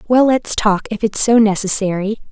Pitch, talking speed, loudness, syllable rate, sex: 215 Hz, 180 wpm, -15 LUFS, 5.1 syllables/s, female